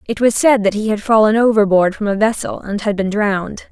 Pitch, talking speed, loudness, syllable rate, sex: 210 Hz, 240 wpm, -15 LUFS, 5.7 syllables/s, female